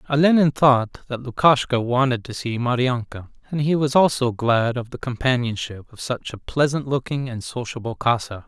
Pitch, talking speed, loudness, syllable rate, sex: 125 Hz, 170 wpm, -21 LUFS, 5.0 syllables/s, male